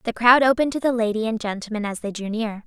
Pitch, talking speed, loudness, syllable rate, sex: 225 Hz, 270 wpm, -21 LUFS, 6.7 syllables/s, female